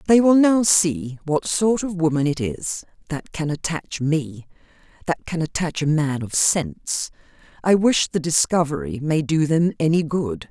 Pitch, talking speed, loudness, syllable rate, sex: 160 Hz, 170 wpm, -21 LUFS, 4.3 syllables/s, female